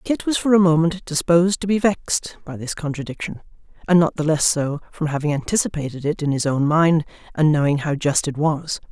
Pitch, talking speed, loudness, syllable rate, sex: 160 Hz, 210 wpm, -20 LUFS, 5.6 syllables/s, female